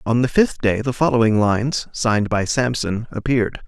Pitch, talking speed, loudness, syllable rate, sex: 120 Hz, 180 wpm, -19 LUFS, 5.2 syllables/s, male